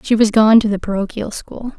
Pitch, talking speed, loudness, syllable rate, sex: 215 Hz, 235 wpm, -15 LUFS, 5.5 syllables/s, female